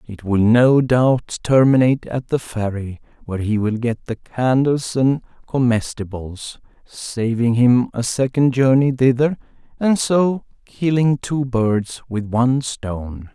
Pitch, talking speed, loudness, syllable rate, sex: 125 Hz, 135 wpm, -18 LUFS, 3.9 syllables/s, male